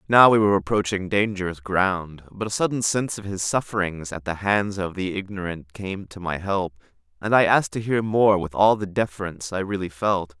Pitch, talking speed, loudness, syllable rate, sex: 95 Hz, 210 wpm, -23 LUFS, 5.3 syllables/s, male